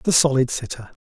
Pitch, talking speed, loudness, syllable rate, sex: 140 Hz, 175 wpm, -20 LUFS, 5.6 syllables/s, male